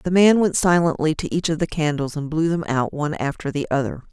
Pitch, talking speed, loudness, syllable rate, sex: 155 Hz, 250 wpm, -21 LUFS, 6.0 syllables/s, female